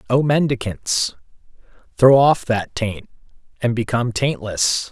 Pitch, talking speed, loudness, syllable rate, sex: 120 Hz, 110 wpm, -18 LUFS, 4.0 syllables/s, male